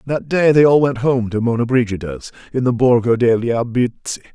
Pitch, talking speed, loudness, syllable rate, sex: 120 Hz, 195 wpm, -16 LUFS, 5.4 syllables/s, male